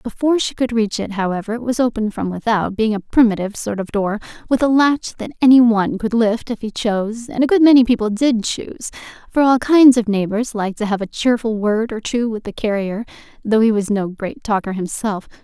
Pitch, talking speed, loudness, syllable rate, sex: 225 Hz, 220 wpm, -17 LUFS, 5.7 syllables/s, female